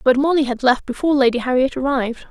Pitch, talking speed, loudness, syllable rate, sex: 265 Hz, 210 wpm, -18 LUFS, 6.9 syllables/s, female